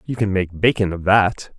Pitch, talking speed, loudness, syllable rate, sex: 100 Hz, 230 wpm, -18 LUFS, 4.7 syllables/s, male